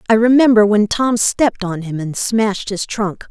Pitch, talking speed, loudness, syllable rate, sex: 215 Hz, 200 wpm, -15 LUFS, 4.9 syllables/s, female